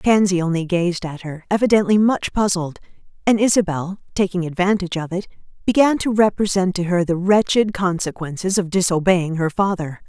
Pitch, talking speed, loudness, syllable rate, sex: 185 Hz, 155 wpm, -19 LUFS, 5.4 syllables/s, female